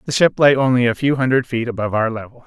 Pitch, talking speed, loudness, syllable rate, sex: 125 Hz, 270 wpm, -17 LUFS, 6.9 syllables/s, male